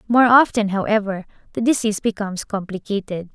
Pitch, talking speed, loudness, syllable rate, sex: 210 Hz, 125 wpm, -19 LUFS, 6.0 syllables/s, female